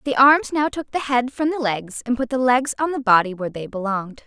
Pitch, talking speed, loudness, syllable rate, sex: 250 Hz, 265 wpm, -20 LUFS, 5.6 syllables/s, female